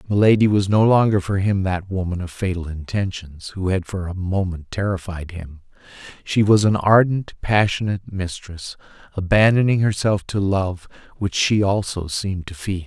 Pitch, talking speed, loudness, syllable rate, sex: 95 Hz, 160 wpm, -20 LUFS, 4.9 syllables/s, male